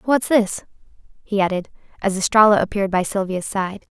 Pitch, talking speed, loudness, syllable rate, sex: 200 Hz, 150 wpm, -19 LUFS, 5.6 syllables/s, female